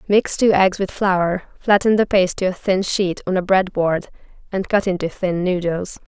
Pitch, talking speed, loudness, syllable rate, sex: 185 Hz, 205 wpm, -19 LUFS, 4.7 syllables/s, female